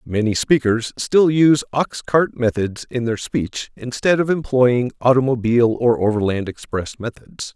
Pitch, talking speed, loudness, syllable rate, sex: 125 Hz, 145 wpm, -18 LUFS, 4.5 syllables/s, male